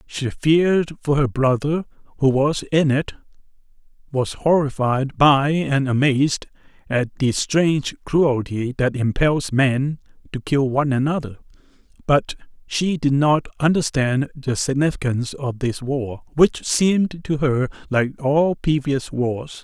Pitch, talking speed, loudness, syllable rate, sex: 140 Hz, 130 wpm, -20 LUFS, 4.0 syllables/s, male